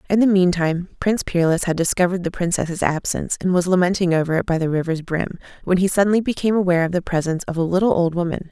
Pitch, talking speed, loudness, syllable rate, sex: 180 Hz, 225 wpm, -20 LUFS, 7.1 syllables/s, female